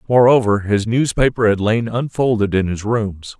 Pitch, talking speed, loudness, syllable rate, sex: 110 Hz, 160 wpm, -17 LUFS, 4.7 syllables/s, male